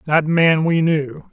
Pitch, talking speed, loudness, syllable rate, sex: 155 Hz, 180 wpm, -16 LUFS, 3.5 syllables/s, male